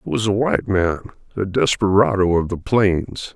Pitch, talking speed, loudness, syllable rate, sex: 95 Hz, 160 wpm, -18 LUFS, 4.8 syllables/s, male